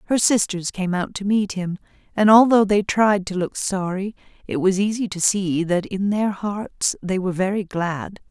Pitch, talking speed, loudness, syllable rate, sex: 195 Hz, 195 wpm, -20 LUFS, 4.5 syllables/s, female